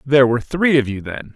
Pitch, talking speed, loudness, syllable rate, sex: 135 Hz, 265 wpm, -17 LUFS, 6.4 syllables/s, male